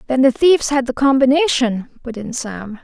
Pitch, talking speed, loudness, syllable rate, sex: 255 Hz, 190 wpm, -16 LUFS, 5.0 syllables/s, female